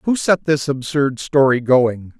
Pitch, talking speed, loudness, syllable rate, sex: 140 Hz, 165 wpm, -17 LUFS, 4.0 syllables/s, male